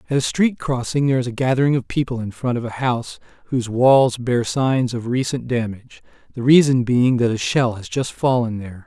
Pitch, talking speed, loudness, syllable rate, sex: 125 Hz, 215 wpm, -19 LUFS, 5.6 syllables/s, male